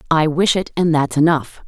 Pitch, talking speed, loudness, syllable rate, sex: 155 Hz, 215 wpm, -17 LUFS, 5.1 syllables/s, female